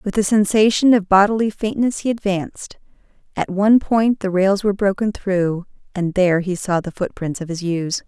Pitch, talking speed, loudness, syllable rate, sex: 195 Hz, 185 wpm, -18 LUFS, 5.2 syllables/s, female